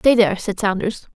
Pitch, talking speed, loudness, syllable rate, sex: 205 Hz, 205 wpm, -19 LUFS, 5.7 syllables/s, female